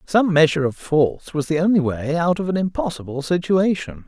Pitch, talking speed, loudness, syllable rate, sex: 160 Hz, 190 wpm, -20 LUFS, 5.5 syllables/s, male